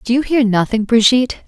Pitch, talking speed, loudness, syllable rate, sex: 235 Hz, 205 wpm, -14 LUFS, 5.8 syllables/s, female